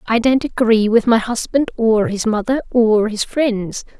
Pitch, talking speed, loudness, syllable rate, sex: 230 Hz, 180 wpm, -16 LUFS, 4.2 syllables/s, female